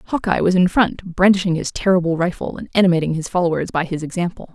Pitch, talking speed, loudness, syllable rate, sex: 180 Hz, 200 wpm, -18 LUFS, 6.3 syllables/s, female